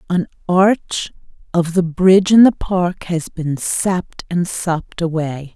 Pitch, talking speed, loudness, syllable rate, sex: 175 Hz, 150 wpm, -17 LUFS, 3.8 syllables/s, female